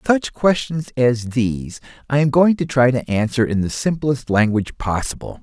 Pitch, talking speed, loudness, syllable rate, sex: 130 Hz, 175 wpm, -19 LUFS, 4.9 syllables/s, male